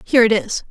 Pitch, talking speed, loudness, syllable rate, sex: 230 Hz, 255 wpm, -16 LUFS, 6.9 syllables/s, female